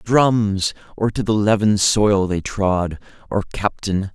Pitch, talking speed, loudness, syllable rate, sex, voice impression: 100 Hz, 145 wpm, -19 LUFS, 3.5 syllables/s, male, very masculine, slightly middle-aged, thick, relaxed, weak, dark, slightly soft, muffled, slightly fluent, slightly raspy, cool, very intellectual, slightly refreshing, very sincere, very calm, mature, friendly, reassuring, very unique, slightly elegant, wild, slightly sweet, slightly lively, slightly strict, very modest